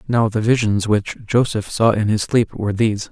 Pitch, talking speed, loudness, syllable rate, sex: 110 Hz, 210 wpm, -18 LUFS, 5.3 syllables/s, male